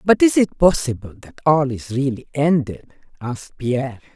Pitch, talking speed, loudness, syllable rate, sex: 140 Hz, 160 wpm, -19 LUFS, 5.0 syllables/s, female